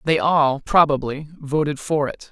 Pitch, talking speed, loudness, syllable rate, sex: 145 Hz, 155 wpm, -20 LUFS, 4.3 syllables/s, male